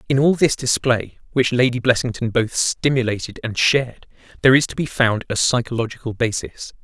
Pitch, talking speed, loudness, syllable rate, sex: 125 Hz, 165 wpm, -19 LUFS, 5.5 syllables/s, male